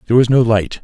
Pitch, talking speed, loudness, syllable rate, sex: 115 Hz, 290 wpm, -13 LUFS, 7.7 syllables/s, male